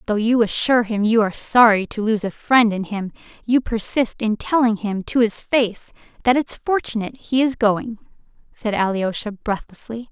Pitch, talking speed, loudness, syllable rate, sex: 225 Hz, 180 wpm, -19 LUFS, 4.8 syllables/s, female